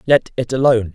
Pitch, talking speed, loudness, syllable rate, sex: 125 Hz, 190 wpm, -16 LUFS, 6.4 syllables/s, male